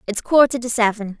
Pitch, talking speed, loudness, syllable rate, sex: 230 Hz, 200 wpm, -17 LUFS, 5.7 syllables/s, female